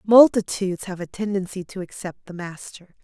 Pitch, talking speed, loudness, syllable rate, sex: 190 Hz, 160 wpm, -23 LUFS, 5.2 syllables/s, female